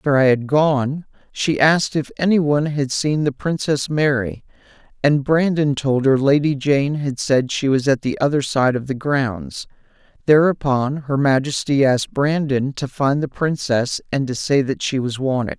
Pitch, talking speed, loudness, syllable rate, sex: 140 Hz, 180 wpm, -19 LUFS, 4.6 syllables/s, male